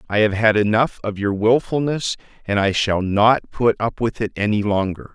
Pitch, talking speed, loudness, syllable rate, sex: 110 Hz, 200 wpm, -19 LUFS, 4.9 syllables/s, male